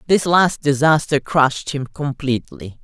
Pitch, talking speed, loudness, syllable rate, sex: 145 Hz, 125 wpm, -18 LUFS, 4.6 syllables/s, female